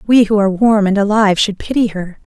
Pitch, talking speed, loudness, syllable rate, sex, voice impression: 205 Hz, 230 wpm, -13 LUFS, 6.3 syllables/s, female, feminine, middle-aged, tensed, slightly powerful, clear, fluent, intellectual, calm, elegant, sharp